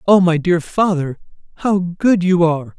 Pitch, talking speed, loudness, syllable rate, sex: 175 Hz, 170 wpm, -16 LUFS, 4.6 syllables/s, male